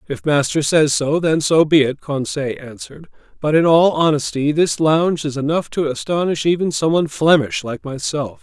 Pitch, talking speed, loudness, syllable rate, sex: 150 Hz, 180 wpm, -17 LUFS, 5.1 syllables/s, male